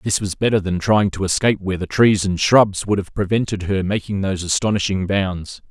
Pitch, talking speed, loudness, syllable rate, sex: 100 Hz, 210 wpm, -19 LUFS, 5.6 syllables/s, male